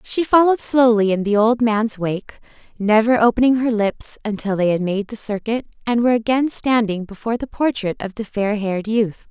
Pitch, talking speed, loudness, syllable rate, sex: 220 Hz, 195 wpm, -19 LUFS, 5.3 syllables/s, female